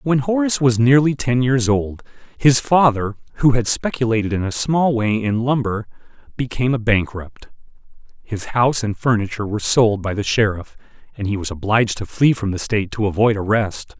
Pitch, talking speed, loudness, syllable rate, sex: 115 Hz, 180 wpm, -18 LUFS, 5.4 syllables/s, male